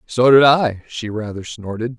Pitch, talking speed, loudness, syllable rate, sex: 115 Hz, 180 wpm, -16 LUFS, 4.4 syllables/s, male